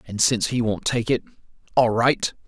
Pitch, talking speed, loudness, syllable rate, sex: 115 Hz, 170 wpm, -22 LUFS, 5.3 syllables/s, male